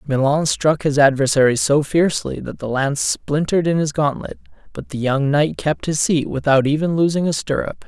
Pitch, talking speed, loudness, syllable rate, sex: 150 Hz, 190 wpm, -18 LUFS, 5.3 syllables/s, male